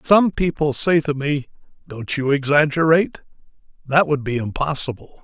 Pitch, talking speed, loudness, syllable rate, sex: 145 Hz, 135 wpm, -19 LUFS, 4.8 syllables/s, male